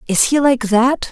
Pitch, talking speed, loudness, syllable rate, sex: 245 Hz, 215 wpm, -14 LUFS, 4.2 syllables/s, female